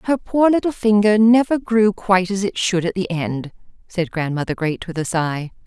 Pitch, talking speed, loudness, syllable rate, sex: 200 Hz, 200 wpm, -18 LUFS, 4.8 syllables/s, female